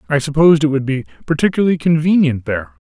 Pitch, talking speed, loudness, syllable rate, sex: 145 Hz, 165 wpm, -15 LUFS, 7.2 syllables/s, male